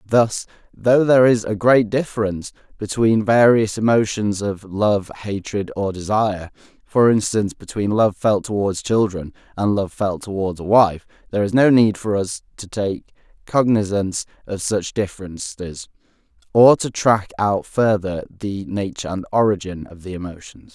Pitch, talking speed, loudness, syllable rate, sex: 105 Hz, 150 wpm, -19 LUFS, 4.7 syllables/s, male